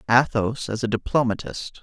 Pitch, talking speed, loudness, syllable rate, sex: 115 Hz, 130 wpm, -23 LUFS, 4.9 syllables/s, male